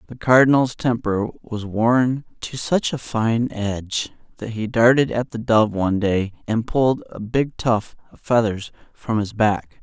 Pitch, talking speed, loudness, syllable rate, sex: 115 Hz, 170 wpm, -20 LUFS, 4.2 syllables/s, male